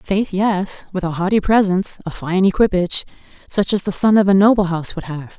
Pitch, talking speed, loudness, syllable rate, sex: 190 Hz, 210 wpm, -17 LUFS, 5.5 syllables/s, female